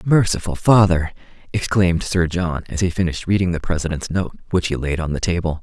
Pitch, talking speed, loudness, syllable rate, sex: 85 Hz, 190 wpm, -20 LUFS, 5.8 syllables/s, male